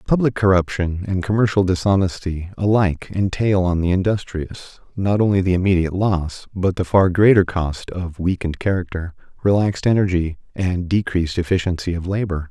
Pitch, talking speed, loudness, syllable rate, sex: 95 Hz, 145 wpm, -19 LUFS, 5.4 syllables/s, male